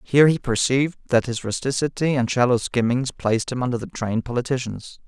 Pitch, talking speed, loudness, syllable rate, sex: 125 Hz, 175 wpm, -22 LUFS, 6.0 syllables/s, male